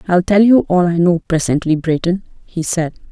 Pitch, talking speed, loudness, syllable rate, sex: 175 Hz, 195 wpm, -15 LUFS, 5.1 syllables/s, female